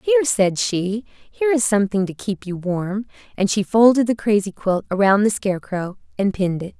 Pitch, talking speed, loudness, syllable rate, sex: 205 Hz, 195 wpm, -20 LUFS, 5.3 syllables/s, female